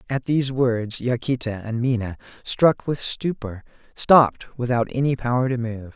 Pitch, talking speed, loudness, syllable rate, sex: 125 Hz, 150 wpm, -22 LUFS, 4.6 syllables/s, male